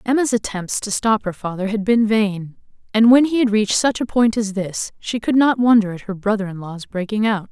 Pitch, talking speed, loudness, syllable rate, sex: 215 Hz, 225 wpm, -18 LUFS, 5.3 syllables/s, female